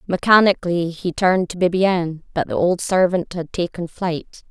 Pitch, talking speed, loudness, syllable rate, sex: 180 Hz, 160 wpm, -19 LUFS, 5.1 syllables/s, female